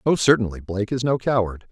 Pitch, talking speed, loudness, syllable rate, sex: 110 Hz, 210 wpm, -21 LUFS, 6.3 syllables/s, male